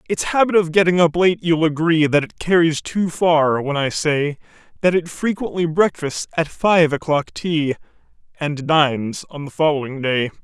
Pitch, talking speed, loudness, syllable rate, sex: 160 Hz, 175 wpm, -18 LUFS, 4.6 syllables/s, male